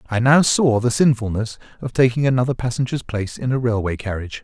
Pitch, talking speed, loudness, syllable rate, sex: 120 Hz, 190 wpm, -19 LUFS, 6.1 syllables/s, male